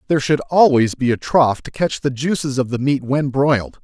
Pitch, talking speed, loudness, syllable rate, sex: 135 Hz, 235 wpm, -17 LUFS, 5.3 syllables/s, male